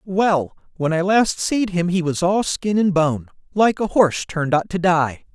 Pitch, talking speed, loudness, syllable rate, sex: 175 Hz, 215 wpm, -19 LUFS, 4.5 syllables/s, male